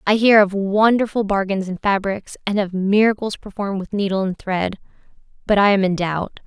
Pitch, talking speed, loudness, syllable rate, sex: 200 Hz, 185 wpm, -19 LUFS, 5.3 syllables/s, female